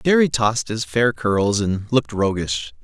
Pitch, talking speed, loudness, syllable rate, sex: 110 Hz, 170 wpm, -20 LUFS, 4.6 syllables/s, male